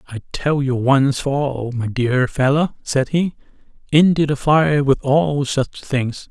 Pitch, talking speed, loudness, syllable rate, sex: 140 Hz, 170 wpm, -18 LUFS, 3.8 syllables/s, male